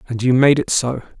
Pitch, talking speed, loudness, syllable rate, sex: 125 Hz, 250 wpm, -16 LUFS, 5.8 syllables/s, male